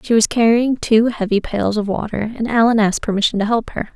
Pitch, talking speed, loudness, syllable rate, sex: 220 Hz, 230 wpm, -17 LUFS, 5.8 syllables/s, female